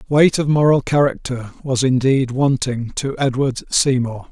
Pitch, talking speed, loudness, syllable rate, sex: 130 Hz, 140 wpm, -18 LUFS, 4.3 syllables/s, male